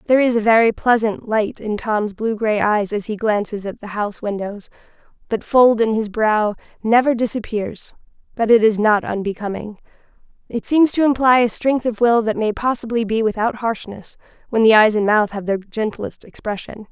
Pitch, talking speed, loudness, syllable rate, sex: 220 Hz, 190 wpm, -18 LUFS, 5.1 syllables/s, female